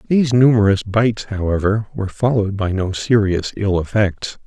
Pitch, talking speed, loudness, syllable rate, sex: 105 Hz, 150 wpm, -17 LUFS, 5.3 syllables/s, male